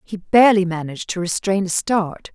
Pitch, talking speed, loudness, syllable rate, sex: 190 Hz, 180 wpm, -18 LUFS, 5.3 syllables/s, female